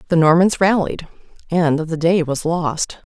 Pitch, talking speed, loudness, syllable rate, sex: 165 Hz, 155 wpm, -17 LUFS, 4.1 syllables/s, female